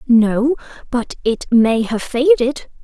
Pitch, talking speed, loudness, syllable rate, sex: 240 Hz, 125 wpm, -17 LUFS, 3.3 syllables/s, female